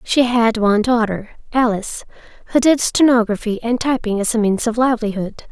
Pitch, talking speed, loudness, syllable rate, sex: 230 Hz, 165 wpm, -17 LUFS, 5.5 syllables/s, female